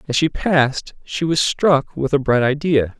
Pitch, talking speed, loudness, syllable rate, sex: 145 Hz, 200 wpm, -18 LUFS, 4.3 syllables/s, male